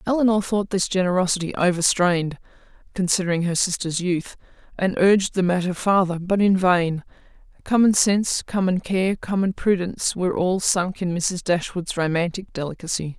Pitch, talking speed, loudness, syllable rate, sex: 180 Hz, 140 wpm, -21 LUFS, 5.3 syllables/s, female